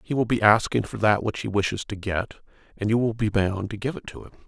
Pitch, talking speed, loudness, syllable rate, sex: 105 Hz, 280 wpm, -24 LUFS, 6.1 syllables/s, male